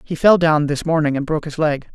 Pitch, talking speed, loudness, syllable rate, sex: 155 Hz, 280 wpm, -17 LUFS, 6.2 syllables/s, male